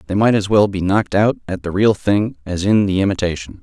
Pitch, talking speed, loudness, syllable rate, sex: 95 Hz, 250 wpm, -17 LUFS, 5.8 syllables/s, male